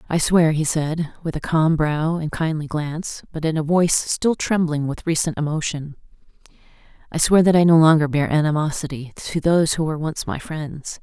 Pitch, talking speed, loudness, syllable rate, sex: 155 Hz, 190 wpm, -20 LUFS, 5.2 syllables/s, female